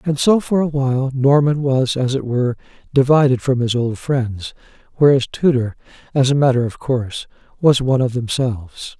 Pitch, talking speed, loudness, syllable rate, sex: 130 Hz, 175 wpm, -17 LUFS, 5.2 syllables/s, male